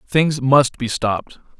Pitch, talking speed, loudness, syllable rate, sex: 135 Hz, 150 wpm, -18 LUFS, 3.9 syllables/s, male